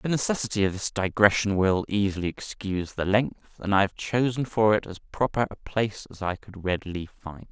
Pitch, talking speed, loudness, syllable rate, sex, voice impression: 100 Hz, 200 wpm, -26 LUFS, 5.3 syllables/s, male, masculine, adult-like, slightly thin, slightly weak, slightly bright, slightly halting, intellectual, slightly friendly, unique, slightly intense, slightly modest